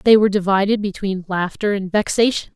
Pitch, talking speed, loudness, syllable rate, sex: 200 Hz, 165 wpm, -18 LUFS, 5.9 syllables/s, female